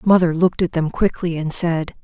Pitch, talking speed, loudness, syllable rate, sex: 170 Hz, 205 wpm, -19 LUFS, 5.4 syllables/s, female